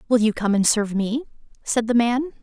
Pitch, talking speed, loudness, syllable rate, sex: 230 Hz, 225 wpm, -21 LUFS, 5.7 syllables/s, female